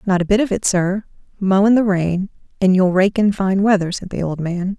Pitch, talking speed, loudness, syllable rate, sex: 190 Hz, 250 wpm, -17 LUFS, 5.2 syllables/s, female